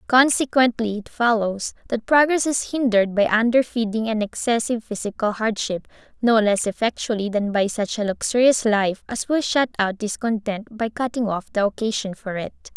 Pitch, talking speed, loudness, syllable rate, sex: 225 Hz, 160 wpm, -21 LUFS, 5.1 syllables/s, female